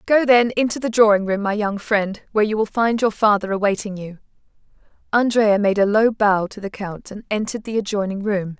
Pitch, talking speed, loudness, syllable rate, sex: 210 Hz, 210 wpm, -19 LUFS, 5.5 syllables/s, female